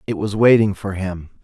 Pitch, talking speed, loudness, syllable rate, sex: 100 Hz, 210 wpm, -18 LUFS, 5.0 syllables/s, male